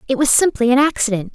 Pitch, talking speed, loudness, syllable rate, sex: 255 Hz, 225 wpm, -15 LUFS, 7.0 syllables/s, female